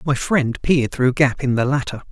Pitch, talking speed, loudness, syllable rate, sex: 135 Hz, 255 wpm, -19 LUFS, 5.7 syllables/s, male